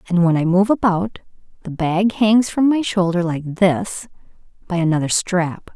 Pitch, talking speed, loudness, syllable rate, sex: 185 Hz, 165 wpm, -18 LUFS, 4.4 syllables/s, female